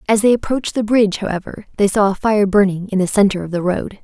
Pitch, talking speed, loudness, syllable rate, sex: 205 Hz, 255 wpm, -16 LUFS, 6.5 syllables/s, female